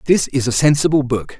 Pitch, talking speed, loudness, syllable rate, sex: 135 Hz, 215 wpm, -16 LUFS, 5.7 syllables/s, male